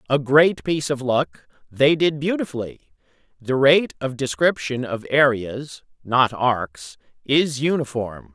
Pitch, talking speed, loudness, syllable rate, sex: 140 Hz, 130 wpm, -20 LUFS, 4.1 syllables/s, male